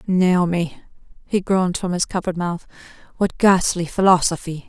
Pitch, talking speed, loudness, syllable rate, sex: 180 Hz, 130 wpm, -19 LUFS, 5.0 syllables/s, female